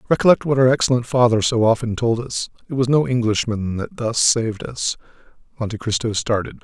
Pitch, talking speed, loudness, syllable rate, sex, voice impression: 120 Hz, 180 wpm, -19 LUFS, 5.7 syllables/s, male, masculine, slightly middle-aged, slightly relaxed, bright, soft, slightly muffled, raspy, cool, calm, mature, friendly, reassuring, wild, slightly lively, kind